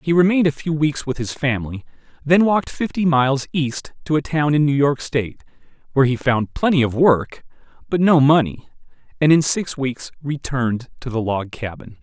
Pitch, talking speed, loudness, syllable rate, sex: 140 Hz, 190 wpm, -19 LUFS, 5.4 syllables/s, male